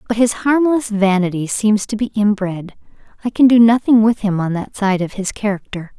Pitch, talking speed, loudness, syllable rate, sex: 210 Hz, 200 wpm, -16 LUFS, 5.1 syllables/s, female